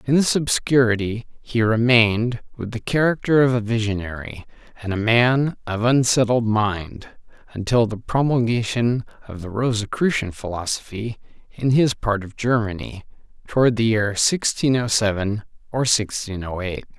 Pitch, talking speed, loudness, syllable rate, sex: 115 Hz, 140 wpm, -20 LUFS, 4.6 syllables/s, male